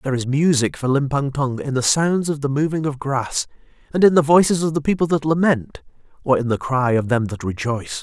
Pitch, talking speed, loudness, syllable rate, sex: 140 Hz, 230 wpm, -19 LUFS, 5.7 syllables/s, male